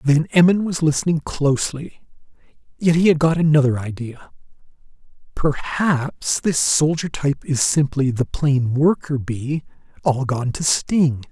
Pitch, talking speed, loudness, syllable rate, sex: 145 Hz, 135 wpm, -19 LUFS, 4.2 syllables/s, male